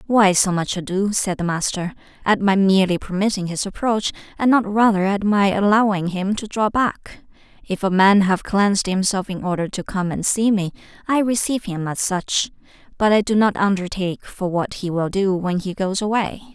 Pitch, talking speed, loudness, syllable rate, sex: 195 Hz, 200 wpm, -20 LUFS, 5.1 syllables/s, female